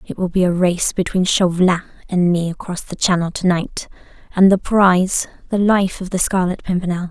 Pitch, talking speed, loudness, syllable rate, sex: 180 Hz, 175 wpm, -17 LUFS, 5.3 syllables/s, female